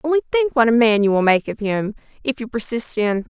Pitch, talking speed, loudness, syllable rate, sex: 235 Hz, 250 wpm, -19 LUFS, 5.8 syllables/s, female